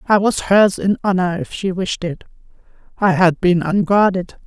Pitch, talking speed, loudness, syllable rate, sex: 185 Hz, 175 wpm, -17 LUFS, 4.6 syllables/s, female